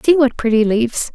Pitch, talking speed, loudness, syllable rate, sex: 245 Hz, 210 wpm, -15 LUFS, 5.9 syllables/s, female